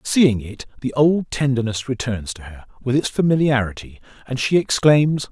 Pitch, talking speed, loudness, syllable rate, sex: 125 Hz, 160 wpm, -19 LUFS, 4.7 syllables/s, male